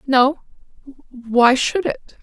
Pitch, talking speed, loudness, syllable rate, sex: 260 Hz, 80 wpm, -17 LUFS, 2.8 syllables/s, female